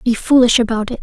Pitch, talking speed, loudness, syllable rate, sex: 235 Hz, 235 wpm, -13 LUFS, 6.5 syllables/s, female